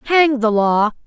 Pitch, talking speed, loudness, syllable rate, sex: 245 Hz, 170 wpm, -16 LUFS, 3.8 syllables/s, female